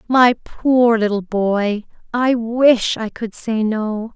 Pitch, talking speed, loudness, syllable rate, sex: 225 Hz, 145 wpm, -17 LUFS, 3.0 syllables/s, female